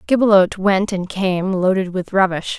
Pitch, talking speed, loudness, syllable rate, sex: 190 Hz, 160 wpm, -17 LUFS, 4.9 syllables/s, female